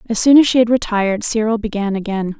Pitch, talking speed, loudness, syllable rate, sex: 220 Hz, 225 wpm, -15 LUFS, 6.1 syllables/s, female